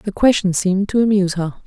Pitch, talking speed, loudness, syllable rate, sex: 195 Hz, 215 wpm, -17 LUFS, 6.5 syllables/s, female